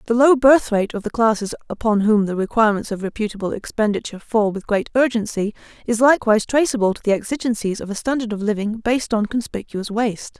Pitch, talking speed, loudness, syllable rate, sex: 220 Hz, 185 wpm, -19 LUFS, 6.4 syllables/s, female